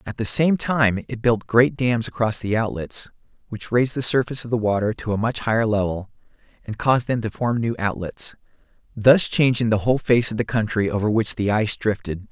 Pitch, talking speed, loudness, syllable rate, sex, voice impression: 115 Hz, 210 wpm, -21 LUFS, 5.6 syllables/s, male, masculine, adult-like, tensed, slightly hard, clear, nasal, cool, slightly intellectual, calm, slightly reassuring, wild, lively, slightly modest